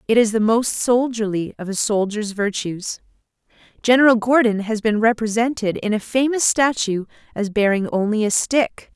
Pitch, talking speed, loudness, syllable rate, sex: 220 Hz, 155 wpm, -19 LUFS, 4.8 syllables/s, female